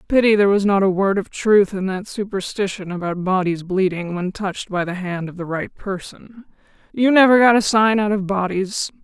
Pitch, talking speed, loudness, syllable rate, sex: 195 Hz, 205 wpm, -19 LUFS, 5.2 syllables/s, female